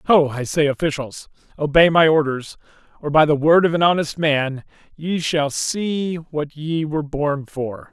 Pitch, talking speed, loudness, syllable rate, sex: 155 Hz, 175 wpm, -19 LUFS, 4.3 syllables/s, male